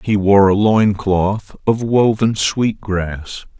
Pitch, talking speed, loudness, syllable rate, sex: 100 Hz, 150 wpm, -15 LUFS, 3.0 syllables/s, male